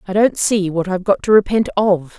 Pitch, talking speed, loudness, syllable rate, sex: 195 Hz, 245 wpm, -16 LUFS, 5.6 syllables/s, female